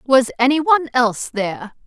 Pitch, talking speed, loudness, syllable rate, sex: 255 Hz, 160 wpm, -17 LUFS, 5.5 syllables/s, female